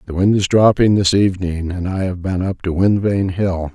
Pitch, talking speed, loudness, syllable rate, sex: 95 Hz, 240 wpm, -17 LUFS, 5.0 syllables/s, male